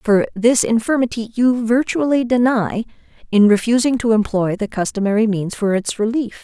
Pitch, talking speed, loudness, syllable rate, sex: 225 Hz, 150 wpm, -17 LUFS, 5.1 syllables/s, female